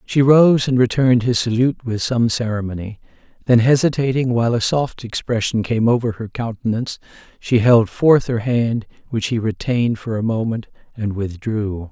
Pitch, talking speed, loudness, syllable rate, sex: 115 Hz, 160 wpm, -18 LUFS, 5.1 syllables/s, male